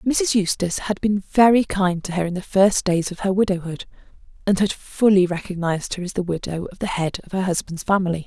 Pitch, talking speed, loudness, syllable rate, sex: 190 Hz, 220 wpm, -21 LUFS, 5.7 syllables/s, female